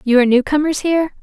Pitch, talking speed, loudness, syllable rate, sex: 285 Hz, 245 wpm, -15 LUFS, 7.3 syllables/s, female